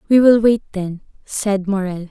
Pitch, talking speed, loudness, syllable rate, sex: 200 Hz, 170 wpm, -17 LUFS, 4.5 syllables/s, female